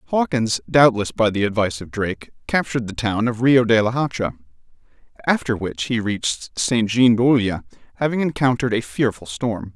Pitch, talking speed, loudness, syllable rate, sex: 115 Hz, 165 wpm, -20 LUFS, 5.4 syllables/s, male